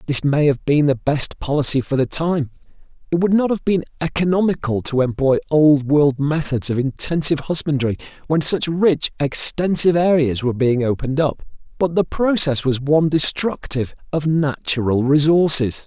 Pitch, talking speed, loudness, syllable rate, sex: 150 Hz, 160 wpm, -18 LUFS, 5.1 syllables/s, male